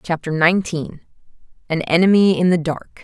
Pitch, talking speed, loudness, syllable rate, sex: 170 Hz, 120 wpm, -17 LUFS, 5.2 syllables/s, female